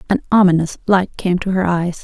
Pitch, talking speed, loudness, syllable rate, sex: 185 Hz, 205 wpm, -16 LUFS, 5.5 syllables/s, female